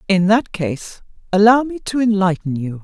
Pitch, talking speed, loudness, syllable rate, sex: 200 Hz, 170 wpm, -17 LUFS, 4.6 syllables/s, female